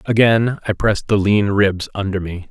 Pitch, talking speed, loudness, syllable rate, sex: 100 Hz, 190 wpm, -17 LUFS, 4.9 syllables/s, male